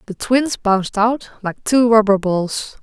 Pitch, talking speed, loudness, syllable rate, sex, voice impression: 215 Hz, 170 wpm, -17 LUFS, 3.9 syllables/s, female, feminine, adult-like, tensed, slightly powerful, bright, hard, muffled, slightly raspy, intellectual, friendly, reassuring, elegant, lively, slightly kind